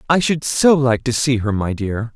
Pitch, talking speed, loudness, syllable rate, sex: 125 Hz, 250 wpm, -17 LUFS, 4.6 syllables/s, male